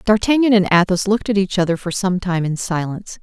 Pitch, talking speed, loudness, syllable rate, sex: 190 Hz, 225 wpm, -17 LUFS, 6.1 syllables/s, female